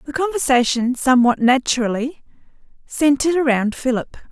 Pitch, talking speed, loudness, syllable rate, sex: 265 Hz, 95 wpm, -18 LUFS, 5.4 syllables/s, female